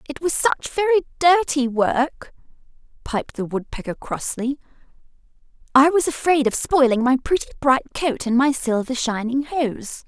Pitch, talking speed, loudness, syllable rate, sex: 270 Hz, 145 wpm, -20 LUFS, 4.5 syllables/s, female